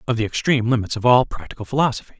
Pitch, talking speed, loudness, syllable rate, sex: 115 Hz, 220 wpm, -19 LUFS, 7.8 syllables/s, male